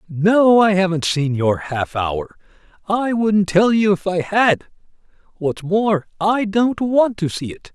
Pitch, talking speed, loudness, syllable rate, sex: 190 Hz, 185 wpm, -18 LUFS, 3.9 syllables/s, male